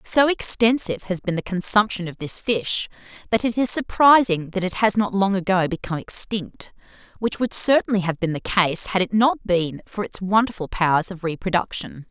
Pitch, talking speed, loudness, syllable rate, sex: 195 Hz, 190 wpm, -20 LUFS, 5.2 syllables/s, female